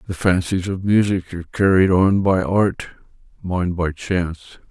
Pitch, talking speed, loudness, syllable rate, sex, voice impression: 90 Hz, 155 wpm, -19 LUFS, 4.6 syllables/s, male, masculine, middle-aged, thick, weak, muffled, slightly halting, sincere, calm, mature, slightly friendly, slightly wild, kind, modest